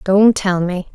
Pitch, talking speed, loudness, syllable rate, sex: 190 Hz, 190 wpm, -15 LUFS, 3.5 syllables/s, female